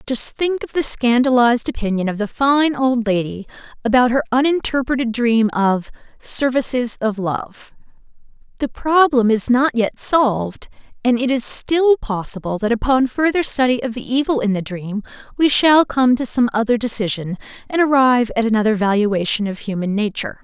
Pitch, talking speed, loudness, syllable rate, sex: 240 Hz, 160 wpm, -17 LUFS, 5.0 syllables/s, female